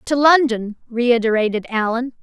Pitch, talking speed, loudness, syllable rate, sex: 240 Hz, 110 wpm, -17 LUFS, 4.6 syllables/s, female